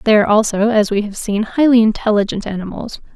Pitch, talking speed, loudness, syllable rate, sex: 210 Hz, 190 wpm, -15 LUFS, 6.2 syllables/s, female